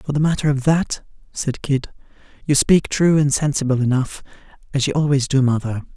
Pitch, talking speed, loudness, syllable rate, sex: 140 Hz, 180 wpm, -19 LUFS, 5.3 syllables/s, male